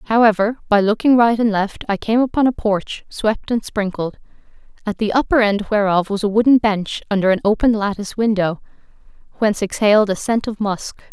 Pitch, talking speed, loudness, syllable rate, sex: 210 Hz, 185 wpm, -17 LUFS, 5.4 syllables/s, female